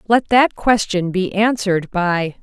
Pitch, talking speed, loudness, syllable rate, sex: 200 Hz, 150 wpm, -17 LUFS, 4.0 syllables/s, female